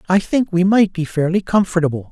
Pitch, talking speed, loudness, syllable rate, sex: 180 Hz, 200 wpm, -17 LUFS, 5.7 syllables/s, male